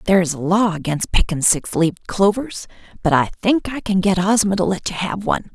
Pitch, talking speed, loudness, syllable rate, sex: 190 Hz, 225 wpm, -18 LUFS, 5.7 syllables/s, female